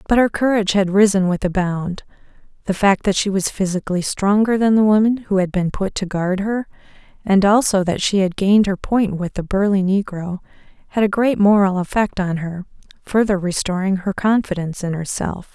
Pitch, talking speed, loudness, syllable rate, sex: 195 Hz, 195 wpm, -18 LUFS, 5.3 syllables/s, female